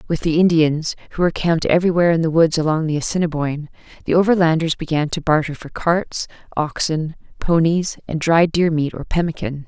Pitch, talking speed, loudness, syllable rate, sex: 160 Hz, 175 wpm, -18 LUFS, 5.9 syllables/s, female